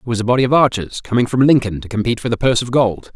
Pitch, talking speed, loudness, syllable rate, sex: 120 Hz, 305 wpm, -16 LUFS, 7.5 syllables/s, male